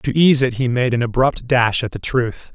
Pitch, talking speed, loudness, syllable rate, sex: 125 Hz, 260 wpm, -18 LUFS, 4.8 syllables/s, male